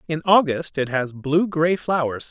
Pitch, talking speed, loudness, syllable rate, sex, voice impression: 155 Hz, 185 wpm, -21 LUFS, 4.3 syllables/s, male, very masculine, adult-like, slightly middle-aged, slightly thick, slightly tensed, powerful, very bright, hard, very clear, very fluent, slightly raspy, cool, intellectual, very refreshing, very sincere, calm, friendly, very reassuring, unique, wild, very lively, slightly kind, intense, light